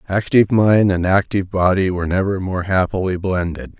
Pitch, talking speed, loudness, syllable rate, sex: 95 Hz, 160 wpm, -17 LUFS, 5.6 syllables/s, male